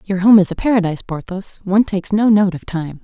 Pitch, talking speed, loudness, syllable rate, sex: 190 Hz, 240 wpm, -16 LUFS, 6.2 syllables/s, female